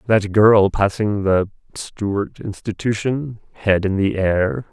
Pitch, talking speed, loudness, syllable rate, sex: 100 Hz, 125 wpm, -19 LUFS, 3.7 syllables/s, male